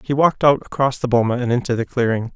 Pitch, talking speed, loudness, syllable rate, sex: 125 Hz, 255 wpm, -18 LUFS, 6.8 syllables/s, male